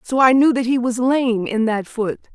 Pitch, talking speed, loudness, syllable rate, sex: 240 Hz, 255 wpm, -18 LUFS, 4.7 syllables/s, female